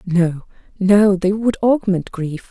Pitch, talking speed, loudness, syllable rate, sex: 190 Hz, 145 wpm, -17 LUFS, 3.4 syllables/s, female